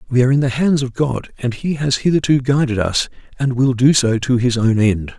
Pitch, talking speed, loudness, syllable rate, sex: 130 Hz, 245 wpm, -17 LUFS, 5.5 syllables/s, male